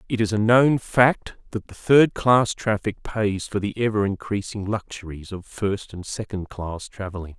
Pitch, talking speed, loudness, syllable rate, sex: 105 Hz, 180 wpm, -22 LUFS, 4.4 syllables/s, male